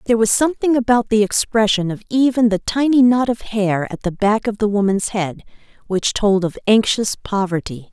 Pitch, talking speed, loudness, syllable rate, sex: 215 Hz, 190 wpm, -17 LUFS, 5.2 syllables/s, female